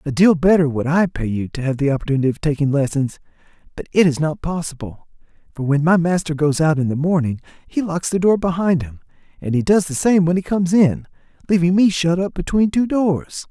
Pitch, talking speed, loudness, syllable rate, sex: 160 Hz, 220 wpm, -18 LUFS, 5.8 syllables/s, male